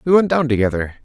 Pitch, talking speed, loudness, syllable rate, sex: 135 Hz, 230 wpm, -17 LUFS, 6.5 syllables/s, male